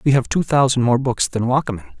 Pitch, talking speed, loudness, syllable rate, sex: 125 Hz, 240 wpm, -18 LUFS, 6.2 syllables/s, male